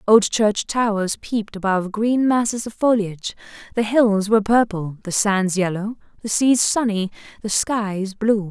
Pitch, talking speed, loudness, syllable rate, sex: 210 Hz, 155 wpm, -20 LUFS, 4.5 syllables/s, female